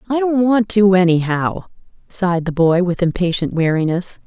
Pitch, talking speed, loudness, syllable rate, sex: 185 Hz, 155 wpm, -16 LUFS, 5.0 syllables/s, female